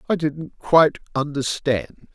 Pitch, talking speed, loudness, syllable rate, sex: 150 Hz, 110 wpm, -21 LUFS, 4.1 syllables/s, male